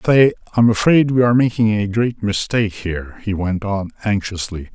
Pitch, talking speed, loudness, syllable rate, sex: 105 Hz, 175 wpm, -17 LUFS, 5.4 syllables/s, male